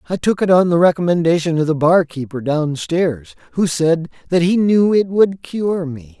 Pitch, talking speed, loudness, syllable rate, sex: 165 Hz, 205 wpm, -16 LUFS, 4.6 syllables/s, male